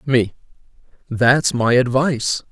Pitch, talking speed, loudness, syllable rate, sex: 125 Hz, 95 wpm, -17 LUFS, 3.7 syllables/s, male